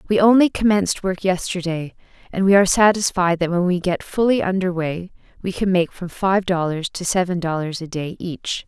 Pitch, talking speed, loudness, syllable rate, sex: 180 Hz, 195 wpm, -19 LUFS, 5.2 syllables/s, female